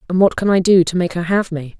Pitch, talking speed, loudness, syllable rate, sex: 180 Hz, 335 wpm, -16 LUFS, 6.2 syllables/s, female